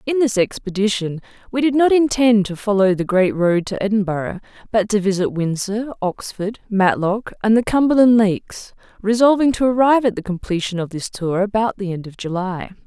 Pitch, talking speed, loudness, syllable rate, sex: 210 Hz, 175 wpm, -18 LUFS, 5.2 syllables/s, female